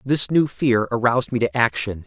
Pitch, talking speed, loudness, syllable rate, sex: 125 Hz, 205 wpm, -20 LUFS, 5.2 syllables/s, male